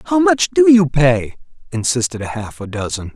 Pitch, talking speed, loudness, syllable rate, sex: 150 Hz, 170 wpm, -16 LUFS, 4.4 syllables/s, male